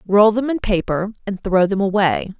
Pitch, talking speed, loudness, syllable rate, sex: 200 Hz, 200 wpm, -18 LUFS, 4.9 syllables/s, female